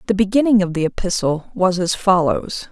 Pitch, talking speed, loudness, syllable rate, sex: 190 Hz, 175 wpm, -18 LUFS, 5.3 syllables/s, female